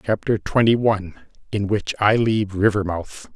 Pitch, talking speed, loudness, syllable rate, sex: 105 Hz, 125 wpm, -20 LUFS, 4.8 syllables/s, male